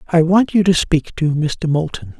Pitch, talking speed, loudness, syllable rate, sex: 165 Hz, 220 wpm, -16 LUFS, 4.4 syllables/s, male